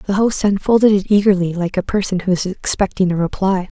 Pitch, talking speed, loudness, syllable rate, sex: 190 Hz, 205 wpm, -16 LUFS, 5.7 syllables/s, female